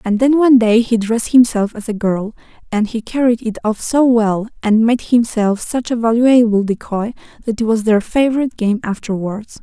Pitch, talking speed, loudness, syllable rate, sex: 225 Hz, 195 wpm, -15 LUFS, 5.1 syllables/s, female